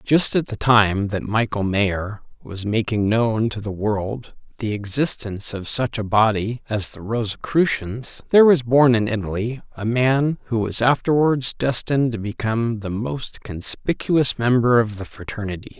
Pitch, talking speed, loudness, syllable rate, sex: 115 Hz, 160 wpm, -20 LUFS, 4.4 syllables/s, male